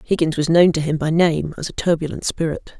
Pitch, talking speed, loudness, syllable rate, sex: 160 Hz, 235 wpm, -19 LUFS, 5.6 syllables/s, female